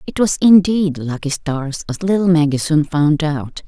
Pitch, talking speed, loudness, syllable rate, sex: 160 Hz, 180 wpm, -16 LUFS, 4.4 syllables/s, female